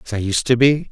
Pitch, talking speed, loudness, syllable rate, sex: 115 Hz, 330 wpm, -17 LUFS, 6.3 syllables/s, male